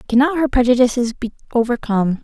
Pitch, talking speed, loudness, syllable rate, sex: 245 Hz, 135 wpm, -17 LUFS, 6.6 syllables/s, female